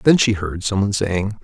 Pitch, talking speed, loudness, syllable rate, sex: 105 Hz, 250 wpm, -19 LUFS, 5.5 syllables/s, male